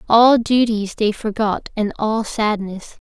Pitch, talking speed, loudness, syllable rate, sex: 215 Hz, 135 wpm, -18 LUFS, 3.7 syllables/s, female